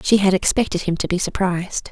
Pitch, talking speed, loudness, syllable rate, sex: 190 Hz, 220 wpm, -20 LUFS, 6.1 syllables/s, female